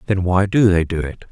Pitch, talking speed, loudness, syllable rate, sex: 95 Hz, 275 wpm, -17 LUFS, 5.4 syllables/s, male